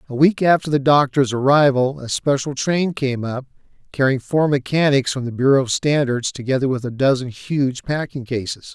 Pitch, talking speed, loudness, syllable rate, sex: 135 Hz, 180 wpm, -19 LUFS, 5.1 syllables/s, male